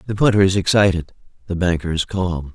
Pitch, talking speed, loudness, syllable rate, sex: 90 Hz, 190 wpm, -18 LUFS, 5.9 syllables/s, male